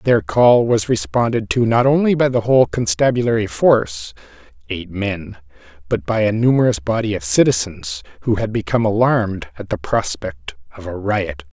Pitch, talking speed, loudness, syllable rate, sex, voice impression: 115 Hz, 160 wpm, -17 LUFS, 5.2 syllables/s, male, very masculine, adult-like, thick, cool, sincere, slightly calm, slightly wild